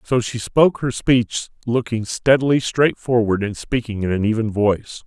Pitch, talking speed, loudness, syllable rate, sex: 115 Hz, 180 wpm, -19 LUFS, 4.9 syllables/s, male